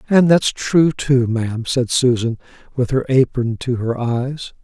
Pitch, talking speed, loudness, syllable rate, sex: 130 Hz, 170 wpm, -17 LUFS, 4.0 syllables/s, male